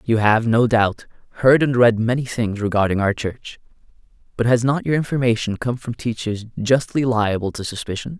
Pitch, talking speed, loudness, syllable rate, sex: 115 Hz, 175 wpm, -19 LUFS, 5.1 syllables/s, male